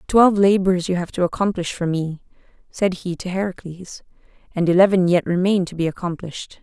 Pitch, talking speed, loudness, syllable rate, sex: 180 Hz, 170 wpm, -20 LUFS, 5.6 syllables/s, female